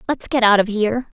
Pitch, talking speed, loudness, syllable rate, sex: 225 Hz, 255 wpm, -17 LUFS, 6.3 syllables/s, female